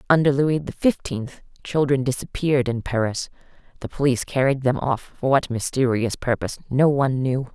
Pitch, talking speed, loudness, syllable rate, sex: 130 Hz, 160 wpm, -22 LUFS, 5.4 syllables/s, female